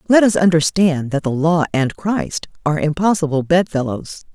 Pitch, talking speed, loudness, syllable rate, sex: 165 Hz, 150 wpm, -17 LUFS, 5.0 syllables/s, female